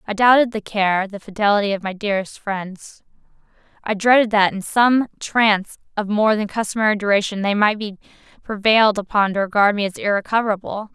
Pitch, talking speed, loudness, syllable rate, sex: 205 Hz, 170 wpm, -18 LUFS, 5.8 syllables/s, female